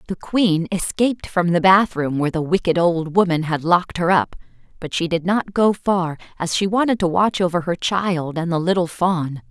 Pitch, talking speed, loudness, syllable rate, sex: 175 Hz, 215 wpm, -19 LUFS, 5.0 syllables/s, female